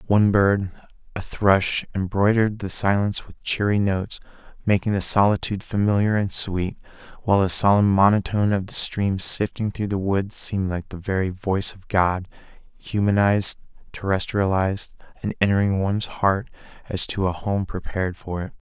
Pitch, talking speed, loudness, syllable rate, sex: 100 Hz, 150 wpm, -22 LUFS, 5.3 syllables/s, male